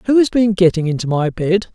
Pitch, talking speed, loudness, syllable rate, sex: 190 Hz, 240 wpm, -16 LUFS, 5.7 syllables/s, male